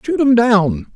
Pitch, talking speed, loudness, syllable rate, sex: 220 Hz, 190 wpm, -14 LUFS, 3.9 syllables/s, male